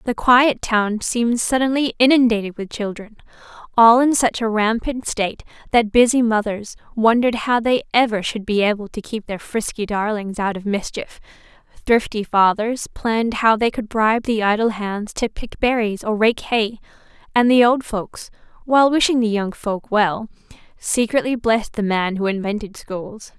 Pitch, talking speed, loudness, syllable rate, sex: 220 Hz, 165 wpm, -19 LUFS, 4.8 syllables/s, female